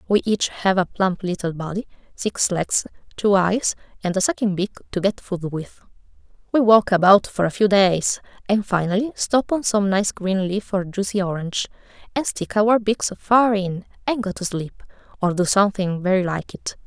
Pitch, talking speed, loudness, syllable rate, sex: 195 Hz, 190 wpm, -21 LUFS, 4.8 syllables/s, female